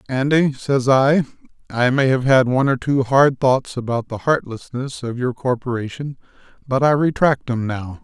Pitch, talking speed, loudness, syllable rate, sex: 130 Hz, 170 wpm, -18 LUFS, 4.6 syllables/s, male